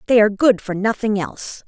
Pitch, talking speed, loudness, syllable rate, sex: 210 Hz, 215 wpm, -18 LUFS, 6.1 syllables/s, female